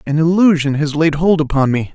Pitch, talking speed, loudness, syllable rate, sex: 155 Hz, 215 wpm, -14 LUFS, 5.5 syllables/s, male